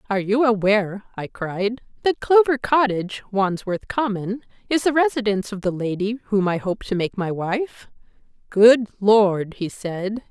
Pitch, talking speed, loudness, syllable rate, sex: 215 Hz, 155 wpm, -21 LUFS, 4.5 syllables/s, female